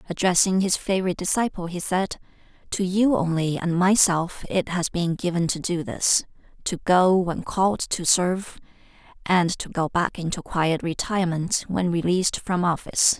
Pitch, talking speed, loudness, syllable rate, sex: 180 Hz, 155 wpm, -23 LUFS, 4.9 syllables/s, female